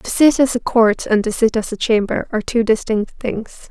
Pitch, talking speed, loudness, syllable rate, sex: 225 Hz, 245 wpm, -17 LUFS, 5.0 syllables/s, female